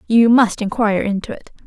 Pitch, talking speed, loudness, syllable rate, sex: 215 Hz, 180 wpm, -16 LUFS, 5.8 syllables/s, female